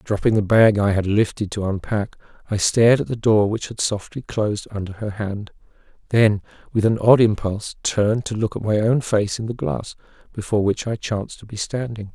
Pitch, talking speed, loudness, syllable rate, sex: 105 Hz, 205 wpm, -20 LUFS, 5.4 syllables/s, male